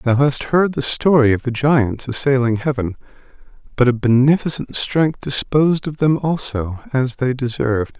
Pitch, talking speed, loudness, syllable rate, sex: 135 Hz, 160 wpm, -17 LUFS, 4.7 syllables/s, male